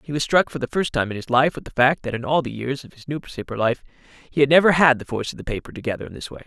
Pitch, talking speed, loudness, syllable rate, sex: 135 Hz, 325 wpm, -21 LUFS, 7.0 syllables/s, male